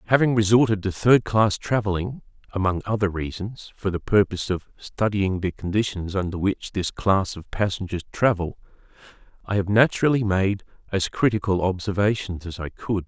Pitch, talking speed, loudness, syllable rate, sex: 100 Hz, 150 wpm, -23 LUFS, 5.2 syllables/s, male